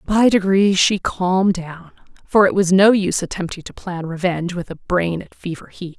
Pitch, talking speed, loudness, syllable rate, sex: 180 Hz, 200 wpm, -18 LUFS, 5.1 syllables/s, female